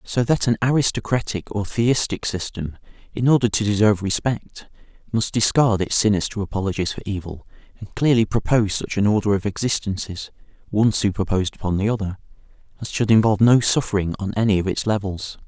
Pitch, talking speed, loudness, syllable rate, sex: 105 Hz, 165 wpm, -21 LUFS, 6.0 syllables/s, male